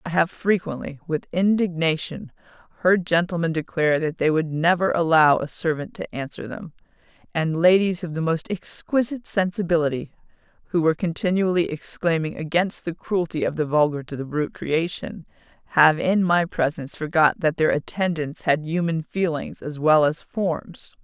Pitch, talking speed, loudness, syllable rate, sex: 165 Hz, 155 wpm, -22 LUFS, 5.0 syllables/s, female